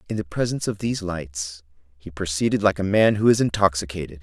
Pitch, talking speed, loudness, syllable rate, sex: 95 Hz, 200 wpm, -22 LUFS, 6.2 syllables/s, male